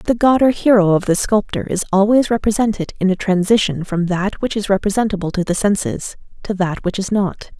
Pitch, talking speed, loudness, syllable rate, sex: 200 Hz, 205 wpm, -17 LUFS, 5.5 syllables/s, female